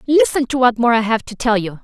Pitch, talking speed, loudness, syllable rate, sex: 240 Hz, 295 wpm, -16 LUFS, 6.0 syllables/s, female